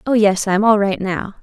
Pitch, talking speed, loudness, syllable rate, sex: 200 Hz, 295 wpm, -16 LUFS, 5.7 syllables/s, female